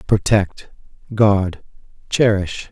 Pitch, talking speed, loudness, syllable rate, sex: 100 Hz, 65 wpm, -18 LUFS, 3.0 syllables/s, male